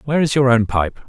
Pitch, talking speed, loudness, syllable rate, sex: 125 Hz, 280 wpm, -16 LUFS, 6.3 syllables/s, male